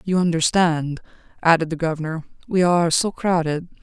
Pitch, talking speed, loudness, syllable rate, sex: 165 Hz, 140 wpm, -20 LUFS, 5.4 syllables/s, female